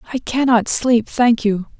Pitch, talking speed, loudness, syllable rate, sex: 235 Hz, 165 wpm, -16 LUFS, 4.2 syllables/s, female